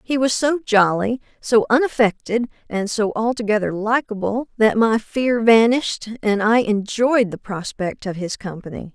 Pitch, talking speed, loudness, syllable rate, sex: 225 Hz, 150 wpm, -19 LUFS, 4.5 syllables/s, female